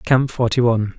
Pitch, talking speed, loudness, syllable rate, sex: 120 Hz, 180 wpm, -18 LUFS, 6.0 syllables/s, male